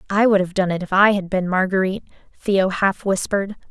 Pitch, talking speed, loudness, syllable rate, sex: 190 Hz, 210 wpm, -19 LUFS, 5.9 syllables/s, female